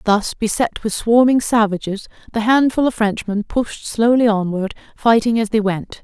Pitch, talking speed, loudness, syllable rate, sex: 220 Hz, 160 wpm, -17 LUFS, 4.6 syllables/s, female